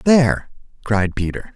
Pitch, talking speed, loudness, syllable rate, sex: 120 Hz, 115 wpm, -19 LUFS, 4.5 syllables/s, male